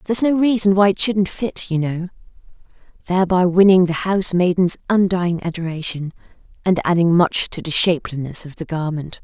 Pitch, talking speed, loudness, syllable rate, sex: 180 Hz, 165 wpm, -18 LUFS, 5.5 syllables/s, female